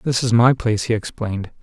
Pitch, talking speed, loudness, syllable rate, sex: 115 Hz, 220 wpm, -19 LUFS, 6.3 syllables/s, male